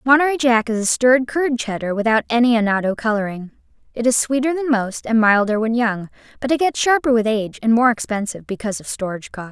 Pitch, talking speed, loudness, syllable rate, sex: 235 Hz, 210 wpm, -18 LUFS, 6.3 syllables/s, female